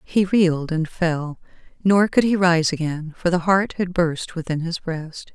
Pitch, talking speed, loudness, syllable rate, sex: 170 Hz, 190 wpm, -21 LUFS, 4.2 syllables/s, female